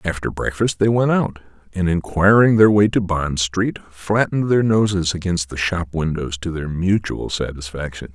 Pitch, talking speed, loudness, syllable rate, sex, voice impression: 90 Hz, 170 wpm, -19 LUFS, 4.7 syllables/s, male, very masculine, very adult-like, slightly old, very thick, relaxed, powerful, dark, slightly soft, slightly muffled, fluent, very cool, intellectual, very sincere, very calm, very mature, very friendly, very reassuring, unique, slightly elegant, wild, slightly sweet, slightly lively, very kind, slightly modest